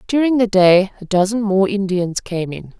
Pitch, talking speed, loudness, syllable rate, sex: 200 Hz, 195 wpm, -16 LUFS, 4.7 syllables/s, female